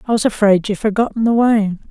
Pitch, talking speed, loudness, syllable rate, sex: 215 Hz, 220 wpm, -15 LUFS, 6.3 syllables/s, female